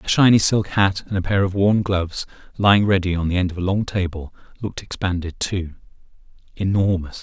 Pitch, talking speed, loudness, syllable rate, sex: 95 Hz, 190 wpm, -20 LUFS, 5.8 syllables/s, male